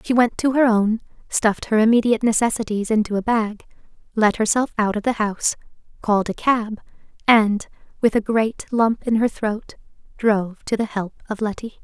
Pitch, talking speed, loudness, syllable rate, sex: 220 Hz, 175 wpm, -20 LUFS, 5.4 syllables/s, female